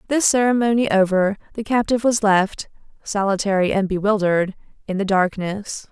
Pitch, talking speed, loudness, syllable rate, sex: 205 Hz, 130 wpm, -19 LUFS, 5.3 syllables/s, female